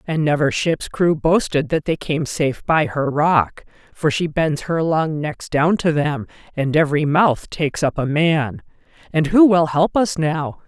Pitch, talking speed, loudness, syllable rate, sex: 155 Hz, 190 wpm, -18 LUFS, 4.2 syllables/s, female